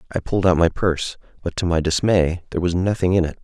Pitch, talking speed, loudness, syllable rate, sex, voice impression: 90 Hz, 245 wpm, -20 LUFS, 6.7 syllables/s, male, masculine, very adult-like, middle-aged, very thick, very relaxed, weak, dark, soft, muffled, fluent, slightly raspy, very cool, very intellectual, sincere, very calm, very friendly, very reassuring, slightly unique, elegant, slightly wild, very sweet, very kind, slightly modest